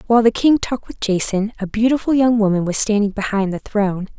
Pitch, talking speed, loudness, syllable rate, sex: 215 Hz, 215 wpm, -18 LUFS, 6.2 syllables/s, female